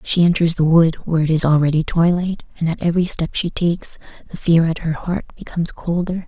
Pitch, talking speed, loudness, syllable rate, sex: 165 Hz, 210 wpm, -18 LUFS, 6.0 syllables/s, female